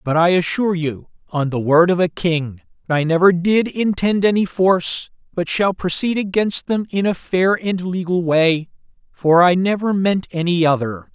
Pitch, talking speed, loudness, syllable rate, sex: 180 Hz, 180 wpm, -18 LUFS, 4.6 syllables/s, male